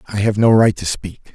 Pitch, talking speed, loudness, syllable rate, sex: 105 Hz, 265 wpm, -15 LUFS, 5.6 syllables/s, male